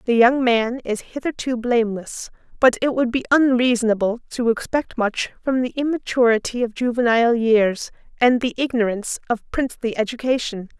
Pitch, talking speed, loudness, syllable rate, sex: 240 Hz, 145 wpm, -20 LUFS, 5.2 syllables/s, female